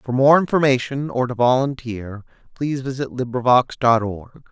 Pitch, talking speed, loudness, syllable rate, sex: 125 Hz, 145 wpm, -19 LUFS, 4.9 syllables/s, male